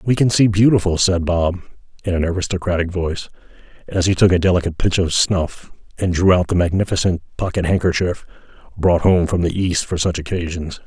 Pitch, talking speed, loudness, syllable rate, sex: 90 Hz, 180 wpm, -18 LUFS, 5.9 syllables/s, male